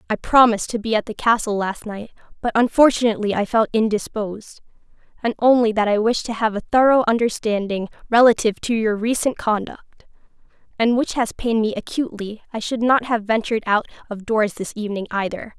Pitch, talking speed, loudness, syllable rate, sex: 220 Hz, 175 wpm, -19 LUFS, 5.9 syllables/s, female